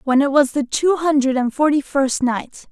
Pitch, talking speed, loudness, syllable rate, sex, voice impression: 275 Hz, 220 wpm, -18 LUFS, 4.6 syllables/s, female, feminine, slightly gender-neutral, slightly young, slightly adult-like, thin, slightly tensed, slightly weak, bright, slightly hard, slightly muffled, slightly halting, raspy, cute, intellectual, sincere, calm, slightly friendly, very unique, sweet, slightly lively, kind, slightly modest